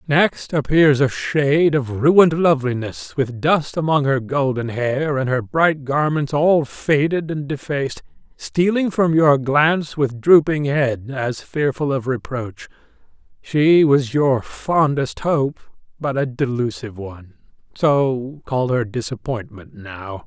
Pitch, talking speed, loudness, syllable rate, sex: 140 Hz, 135 wpm, -19 LUFS, 3.9 syllables/s, male